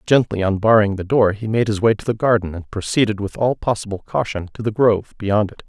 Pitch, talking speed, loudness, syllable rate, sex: 105 Hz, 230 wpm, -19 LUFS, 5.9 syllables/s, male